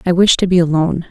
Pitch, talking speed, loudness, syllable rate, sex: 175 Hz, 270 wpm, -13 LUFS, 7.1 syllables/s, female